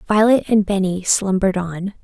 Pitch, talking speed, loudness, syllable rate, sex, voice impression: 195 Hz, 145 wpm, -17 LUFS, 5.1 syllables/s, female, very feminine, very young, very thin, tensed, slightly powerful, very bright, soft, clear, fluent, slightly raspy, very cute, slightly intellectual, very refreshing, sincere, slightly calm, very friendly, reassuring, very unique, very elegant, slightly wild, sweet, lively, very kind, slightly intense, slightly sharp, very light